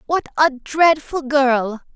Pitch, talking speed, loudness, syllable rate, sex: 280 Hz, 125 wpm, -18 LUFS, 3.3 syllables/s, female